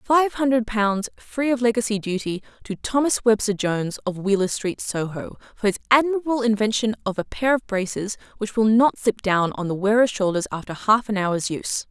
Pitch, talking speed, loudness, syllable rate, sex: 215 Hz, 190 wpm, -22 LUFS, 5.3 syllables/s, female